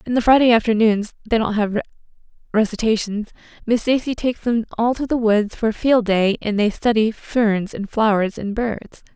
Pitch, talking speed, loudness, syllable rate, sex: 220 Hz, 185 wpm, -19 LUFS, 5.1 syllables/s, female